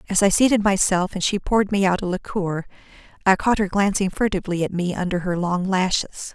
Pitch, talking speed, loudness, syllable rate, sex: 190 Hz, 210 wpm, -21 LUFS, 5.8 syllables/s, female